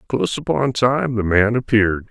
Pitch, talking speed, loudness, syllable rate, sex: 115 Hz, 170 wpm, -18 LUFS, 5.2 syllables/s, male